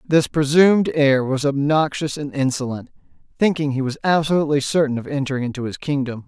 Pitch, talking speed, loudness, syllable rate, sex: 140 Hz, 165 wpm, -19 LUFS, 5.8 syllables/s, male